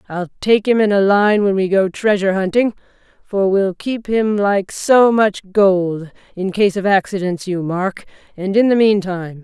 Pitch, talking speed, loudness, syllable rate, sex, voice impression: 195 Hz, 185 wpm, -16 LUFS, 4.4 syllables/s, female, feminine, middle-aged, tensed, powerful, hard, intellectual, calm, friendly, reassuring, elegant, lively, kind